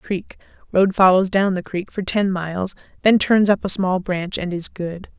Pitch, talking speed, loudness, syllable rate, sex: 185 Hz, 195 wpm, -19 LUFS, 4.5 syllables/s, female